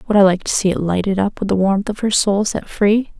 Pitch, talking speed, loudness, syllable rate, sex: 200 Hz, 300 wpm, -17 LUFS, 5.7 syllables/s, female